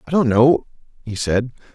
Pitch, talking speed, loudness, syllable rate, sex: 125 Hz, 170 wpm, -18 LUFS, 4.8 syllables/s, male